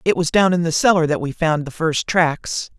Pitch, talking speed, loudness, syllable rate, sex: 165 Hz, 260 wpm, -18 LUFS, 5.0 syllables/s, male